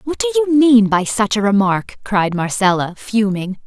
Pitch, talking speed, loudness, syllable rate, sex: 220 Hz, 180 wpm, -16 LUFS, 4.4 syllables/s, female